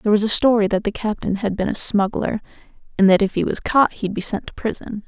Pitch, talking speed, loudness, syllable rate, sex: 205 Hz, 260 wpm, -19 LUFS, 6.1 syllables/s, female